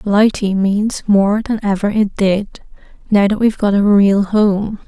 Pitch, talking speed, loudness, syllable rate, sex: 205 Hz, 170 wpm, -14 LUFS, 4.0 syllables/s, female